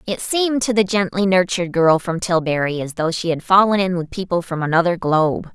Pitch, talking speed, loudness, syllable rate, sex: 180 Hz, 215 wpm, -18 LUFS, 5.7 syllables/s, female